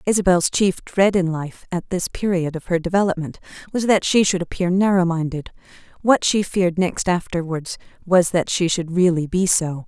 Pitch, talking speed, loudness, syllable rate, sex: 175 Hz, 180 wpm, -20 LUFS, 5.0 syllables/s, female